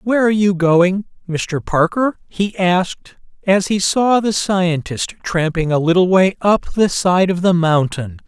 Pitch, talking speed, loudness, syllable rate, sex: 180 Hz, 165 wpm, -16 LUFS, 4.1 syllables/s, male